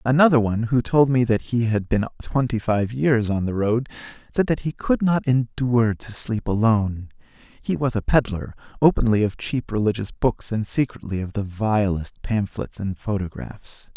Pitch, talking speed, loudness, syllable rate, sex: 115 Hz, 175 wpm, -22 LUFS, 2.8 syllables/s, male